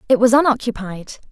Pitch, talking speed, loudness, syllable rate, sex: 235 Hz, 135 wpm, -16 LUFS, 5.8 syllables/s, female